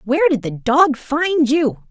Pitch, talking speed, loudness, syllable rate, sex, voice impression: 275 Hz, 190 wpm, -17 LUFS, 4.3 syllables/s, female, feminine, adult-like, clear, slightly intellectual, slightly strict